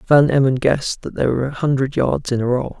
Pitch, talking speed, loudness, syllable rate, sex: 135 Hz, 255 wpm, -18 LUFS, 6.3 syllables/s, male